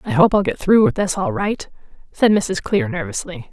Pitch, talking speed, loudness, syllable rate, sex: 200 Hz, 220 wpm, -18 LUFS, 5.0 syllables/s, female